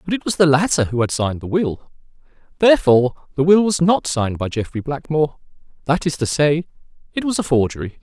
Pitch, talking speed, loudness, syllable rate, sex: 150 Hz, 200 wpm, -18 LUFS, 6.2 syllables/s, male